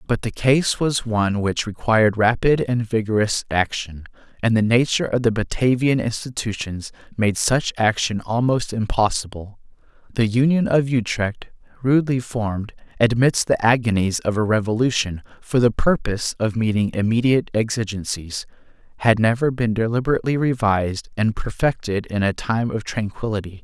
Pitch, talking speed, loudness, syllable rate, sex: 115 Hz, 135 wpm, -20 LUFS, 5.1 syllables/s, male